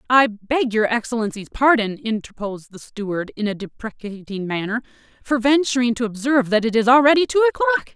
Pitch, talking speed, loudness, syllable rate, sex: 235 Hz, 165 wpm, -19 LUFS, 5.7 syllables/s, female